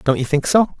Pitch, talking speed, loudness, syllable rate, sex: 160 Hz, 300 wpm, -17 LUFS, 6.8 syllables/s, male